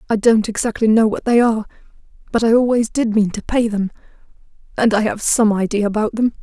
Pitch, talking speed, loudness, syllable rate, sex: 220 Hz, 205 wpm, -17 LUFS, 6.0 syllables/s, female